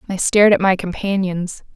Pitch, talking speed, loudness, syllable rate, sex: 190 Hz, 170 wpm, -17 LUFS, 5.4 syllables/s, female